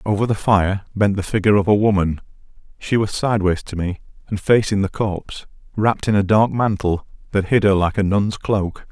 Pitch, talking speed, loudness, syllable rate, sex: 100 Hz, 200 wpm, -19 LUFS, 5.5 syllables/s, male